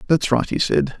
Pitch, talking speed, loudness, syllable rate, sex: 140 Hz, 240 wpm, -19 LUFS, 5.2 syllables/s, male